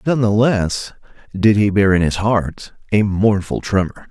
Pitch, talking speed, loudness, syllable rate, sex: 105 Hz, 175 wpm, -16 LUFS, 4.1 syllables/s, male